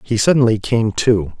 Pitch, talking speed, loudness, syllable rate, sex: 115 Hz, 170 wpm, -16 LUFS, 4.8 syllables/s, male